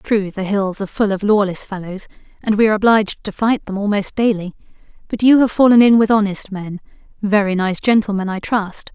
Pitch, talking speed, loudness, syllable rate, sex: 205 Hz, 195 wpm, -16 LUFS, 5.7 syllables/s, female